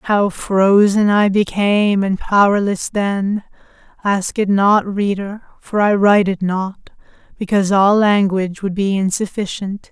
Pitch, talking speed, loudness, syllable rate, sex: 200 Hz, 135 wpm, -16 LUFS, 4.2 syllables/s, female